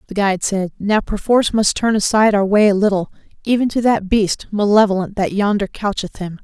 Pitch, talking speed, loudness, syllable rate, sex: 205 Hz, 195 wpm, -16 LUFS, 5.7 syllables/s, female